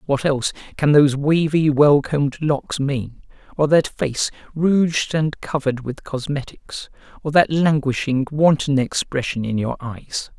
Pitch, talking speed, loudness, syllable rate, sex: 145 Hz, 145 wpm, -19 LUFS, 4.3 syllables/s, male